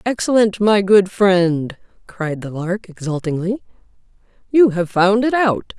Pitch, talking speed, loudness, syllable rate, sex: 195 Hz, 135 wpm, -17 LUFS, 4.0 syllables/s, female